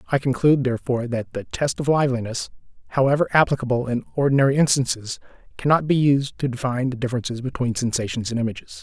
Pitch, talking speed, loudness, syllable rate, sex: 130 Hz, 165 wpm, -22 LUFS, 7.0 syllables/s, male